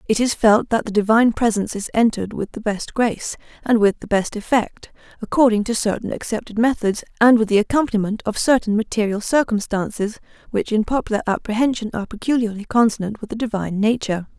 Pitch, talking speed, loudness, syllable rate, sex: 220 Hz, 175 wpm, -19 LUFS, 6.2 syllables/s, female